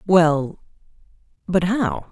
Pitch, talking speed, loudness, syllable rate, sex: 175 Hz, 85 wpm, -20 LUFS, 2.8 syllables/s, female